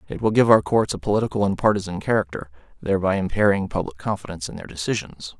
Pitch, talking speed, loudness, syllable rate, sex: 95 Hz, 190 wpm, -22 LUFS, 6.9 syllables/s, male